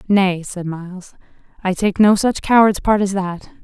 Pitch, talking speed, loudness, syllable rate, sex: 195 Hz, 180 wpm, -17 LUFS, 4.5 syllables/s, female